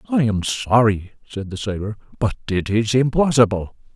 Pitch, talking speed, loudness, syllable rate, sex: 110 Hz, 150 wpm, -20 LUFS, 4.9 syllables/s, male